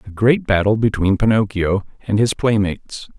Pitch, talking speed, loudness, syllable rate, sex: 105 Hz, 150 wpm, -17 LUFS, 5.1 syllables/s, male